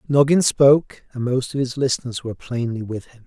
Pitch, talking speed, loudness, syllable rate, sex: 130 Hz, 200 wpm, -20 LUFS, 5.7 syllables/s, male